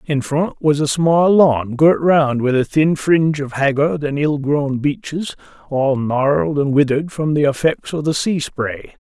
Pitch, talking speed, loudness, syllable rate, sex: 145 Hz, 190 wpm, -17 LUFS, 4.3 syllables/s, male